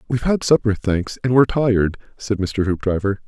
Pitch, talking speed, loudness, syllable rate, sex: 110 Hz, 185 wpm, -19 LUFS, 5.8 syllables/s, male